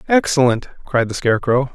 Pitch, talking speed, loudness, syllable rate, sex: 130 Hz, 140 wpm, -17 LUFS, 5.7 syllables/s, male